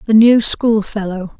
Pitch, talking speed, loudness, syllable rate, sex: 210 Hz, 130 wpm, -14 LUFS, 4.2 syllables/s, female